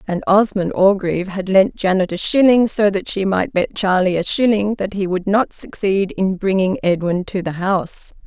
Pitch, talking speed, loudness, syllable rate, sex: 195 Hz, 195 wpm, -17 LUFS, 4.8 syllables/s, female